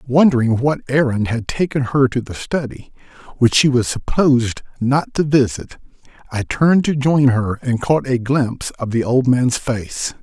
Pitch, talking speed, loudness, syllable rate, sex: 130 Hz, 175 wpm, -17 LUFS, 4.6 syllables/s, male